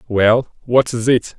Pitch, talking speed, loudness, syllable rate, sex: 120 Hz, 175 wpm, -16 LUFS, 3.5 syllables/s, male